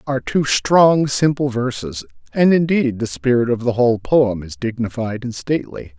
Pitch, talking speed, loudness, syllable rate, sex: 125 Hz, 170 wpm, -18 LUFS, 4.9 syllables/s, male